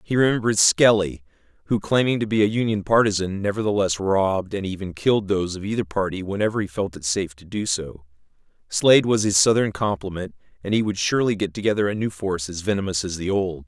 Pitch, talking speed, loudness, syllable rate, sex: 100 Hz, 200 wpm, -22 LUFS, 6.3 syllables/s, male